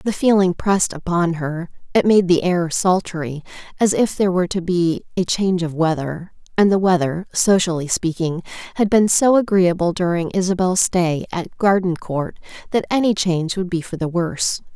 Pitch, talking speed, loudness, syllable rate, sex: 180 Hz, 170 wpm, -19 LUFS, 5.0 syllables/s, female